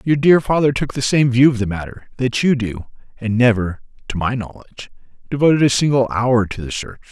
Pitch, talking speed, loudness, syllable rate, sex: 120 Hz, 210 wpm, -17 LUFS, 5.5 syllables/s, male